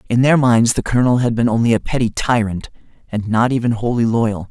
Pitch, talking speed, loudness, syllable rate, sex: 115 Hz, 215 wpm, -16 LUFS, 5.8 syllables/s, male